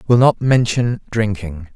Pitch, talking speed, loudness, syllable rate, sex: 110 Hz, 135 wpm, -17 LUFS, 4.1 syllables/s, male